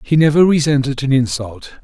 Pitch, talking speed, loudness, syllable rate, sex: 140 Hz, 165 wpm, -15 LUFS, 5.3 syllables/s, male